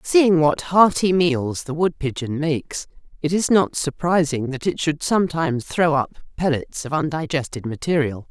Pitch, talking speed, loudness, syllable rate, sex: 155 Hz, 150 wpm, -20 LUFS, 4.7 syllables/s, female